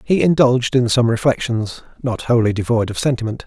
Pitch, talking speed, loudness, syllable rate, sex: 120 Hz, 155 wpm, -17 LUFS, 5.7 syllables/s, male